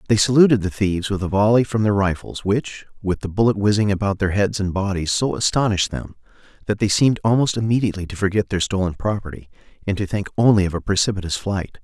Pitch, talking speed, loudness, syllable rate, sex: 100 Hz, 210 wpm, -20 LUFS, 6.4 syllables/s, male